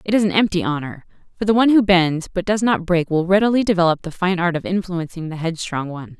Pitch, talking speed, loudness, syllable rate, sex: 180 Hz, 240 wpm, -19 LUFS, 6.3 syllables/s, female